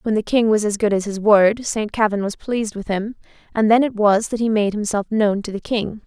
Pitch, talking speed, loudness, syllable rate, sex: 210 Hz, 265 wpm, -19 LUFS, 5.4 syllables/s, female